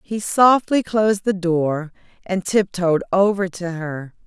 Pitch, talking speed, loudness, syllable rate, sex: 190 Hz, 140 wpm, -19 LUFS, 3.8 syllables/s, female